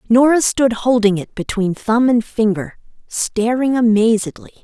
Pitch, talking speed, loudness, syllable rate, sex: 225 Hz, 130 wpm, -16 LUFS, 4.4 syllables/s, female